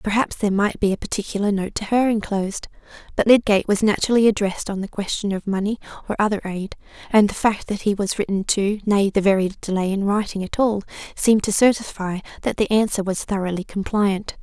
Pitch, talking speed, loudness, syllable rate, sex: 205 Hz, 200 wpm, -21 LUFS, 6.0 syllables/s, female